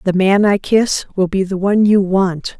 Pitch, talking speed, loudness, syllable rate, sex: 195 Hz, 230 wpm, -15 LUFS, 4.6 syllables/s, female